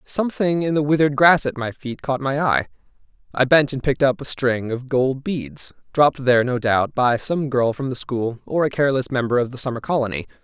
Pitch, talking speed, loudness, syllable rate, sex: 130 Hz, 225 wpm, -20 LUFS, 5.6 syllables/s, male